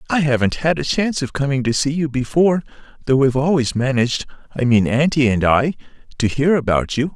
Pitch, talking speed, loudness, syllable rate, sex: 135 Hz, 185 wpm, -18 LUFS, 6.1 syllables/s, male